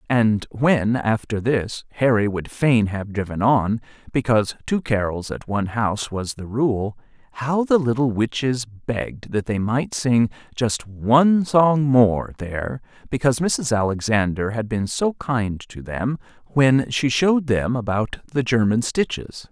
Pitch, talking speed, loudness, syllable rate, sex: 120 Hz, 155 wpm, -21 LUFS, 4.2 syllables/s, male